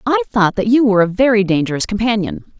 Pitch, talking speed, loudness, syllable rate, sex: 215 Hz, 210 wpm, -15 LUFS, 6.4 syllables/s, female